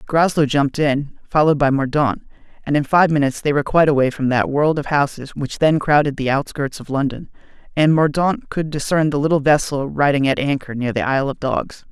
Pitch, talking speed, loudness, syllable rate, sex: 145 Hz, 205 wpm, -18 LUFS, 5.8 syllables/s, male